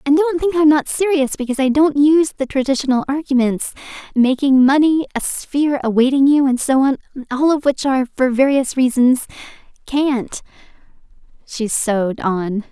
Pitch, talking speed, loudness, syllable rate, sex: 270 Hz, 145 wpm, -16 LUFS, 5.1 syllables/s, female